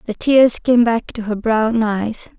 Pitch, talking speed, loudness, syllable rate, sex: 225 Hz, 200 wpm, -16 LUFS, 3.8 syllables/s, female